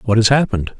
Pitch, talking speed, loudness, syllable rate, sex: 115 Hz, 225 wpm, -15 LUFS, 7.5 syllables/s, male